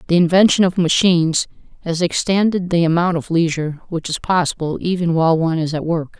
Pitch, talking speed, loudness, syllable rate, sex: 170 Hz, 185 wpm, -17 LUFS, 6.0 syllables/s, female